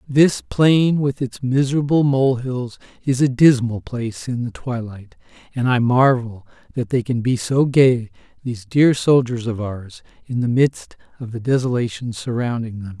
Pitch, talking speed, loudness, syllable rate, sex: 125 Hz, 160 wpm, -19 LUFS, 4.6 syllables/s, male